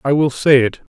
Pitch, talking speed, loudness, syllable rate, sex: 135 Hz, 250 wpm, -15 LUFS, 5.2 syllables/s, male